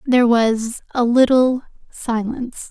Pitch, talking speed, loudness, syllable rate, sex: 240 Hz, 110 wpm, -17 LUFS, 4.2 syllables/s, female